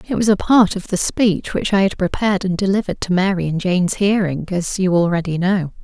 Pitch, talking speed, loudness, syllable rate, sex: 190 Hz, 225 wpm, -18 LUFS, 5.7 syllables/s, female